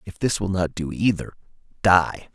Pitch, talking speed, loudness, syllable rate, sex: 90 Hz, 180 wpm, -22 LUFS, 4.7 syllables/s, male